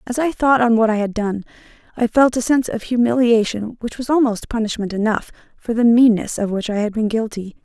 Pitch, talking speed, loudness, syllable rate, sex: 225 Hz, 220 wpm, -18 LUFS, 5.7 syllables/s, female